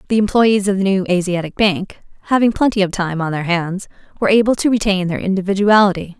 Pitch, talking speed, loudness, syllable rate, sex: 195 Hz, 195 wpm, -16 LUFS, 6.2 syllables/s, female